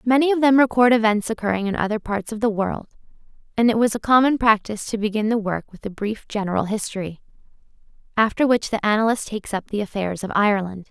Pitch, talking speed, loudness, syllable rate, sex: 215 Hz, 205 wpm, -21 LUFS, 6.4 syllables/s, female